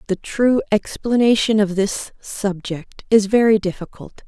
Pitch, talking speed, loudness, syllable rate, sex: 210 Hz, 125 wpm, -18 LUFS, 4.2 syllables/s, female